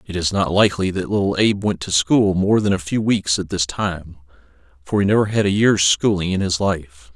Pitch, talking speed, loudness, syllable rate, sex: 95 Hz, 235 wpm, -18 LUFS, 5.3 syllables/s, male